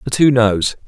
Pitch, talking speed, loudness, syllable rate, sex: 120 Hz, 205 wpm, -14 LUFS, 4.3 syllables/s, male